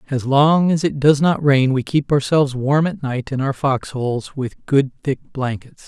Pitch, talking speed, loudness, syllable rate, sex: 140 Hz, 215 wpm, -18 LUFS, 4.4 syllables/s, male